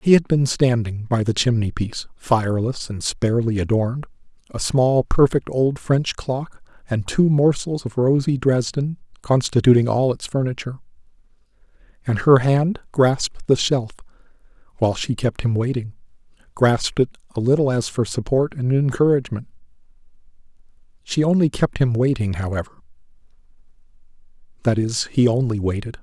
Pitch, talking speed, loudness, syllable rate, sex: 125 Hz, 135 wpm, -20 LUFS, 5.1 syllables/s, male